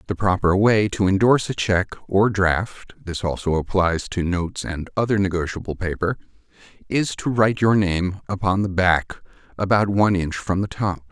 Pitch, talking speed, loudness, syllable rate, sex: 95 Hz, 160 wpm, -21 LUFS, 5.1 syllables/s, male